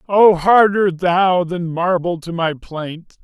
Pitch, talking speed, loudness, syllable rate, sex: 180 Hz, 150 wpm, -16 LUFS, 3.3 syllables/s, male